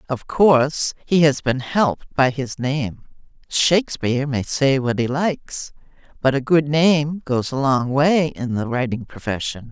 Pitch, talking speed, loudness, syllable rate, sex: 140 Hz, 165 wpm, -20 LUFS, 4.2 syllables/s, female